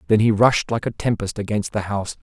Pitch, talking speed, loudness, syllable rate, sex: 105 Hz, 235 wpm, -21 LUFS, 6.0 syllables/s, male